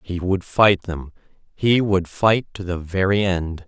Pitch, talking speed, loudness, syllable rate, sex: 95 Hz, 165 wpm, -20 LUFS, 3.9 syllables/s, male